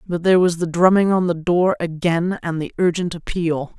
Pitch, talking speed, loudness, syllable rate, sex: 170 Hz, 205 wpm, -19 LUFS, 5.1 syllables/s, female